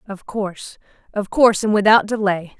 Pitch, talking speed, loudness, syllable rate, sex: 205 Hz, 160 wpm, -18 LUFS, 5.2 syllables/s, female